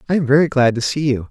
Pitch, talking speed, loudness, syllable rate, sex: 135 Hz, 325 wpm, -16 LUFS, 7.1 syllables/s, male